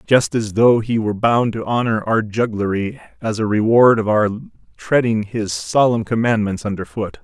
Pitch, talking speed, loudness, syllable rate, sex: 110 Hz, 175 wpm, -18 LUFS, 4.9 syllables/s, male